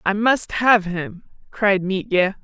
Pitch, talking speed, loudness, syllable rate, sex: 200 Hz, 150 wpm, -19 LUFS, 3.4 syllables/s, female